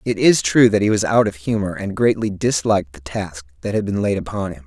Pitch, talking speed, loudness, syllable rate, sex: 100 Hz, 255 wpm, -19 LUFS, 5.7 syllables/s, male